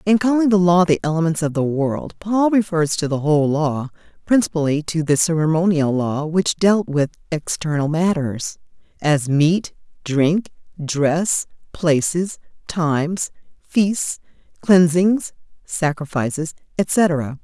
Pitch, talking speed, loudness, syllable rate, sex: 165 Hz, 120 wpm, -19 LUFS, 3.9 syllables/s, female